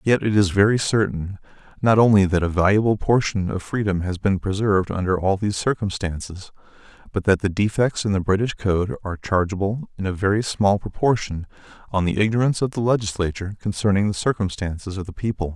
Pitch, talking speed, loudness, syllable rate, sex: 100 Hz, 180 wpm, -21 LUFS, 6.0 syllables/s, male